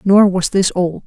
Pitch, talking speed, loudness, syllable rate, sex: 190 Hz, 225 wpm, -15 LUFS, 4.1 syllables/s, female